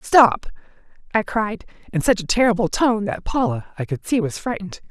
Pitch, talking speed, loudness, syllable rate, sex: 225 Hz, 185 wpm, -21 LUFS, 5.4 syllables/s, female